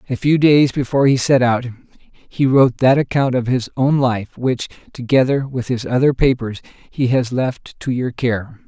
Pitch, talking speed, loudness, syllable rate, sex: 125 Hz, 185 wpm, -17 LUFS, 4.5 syllables/s, male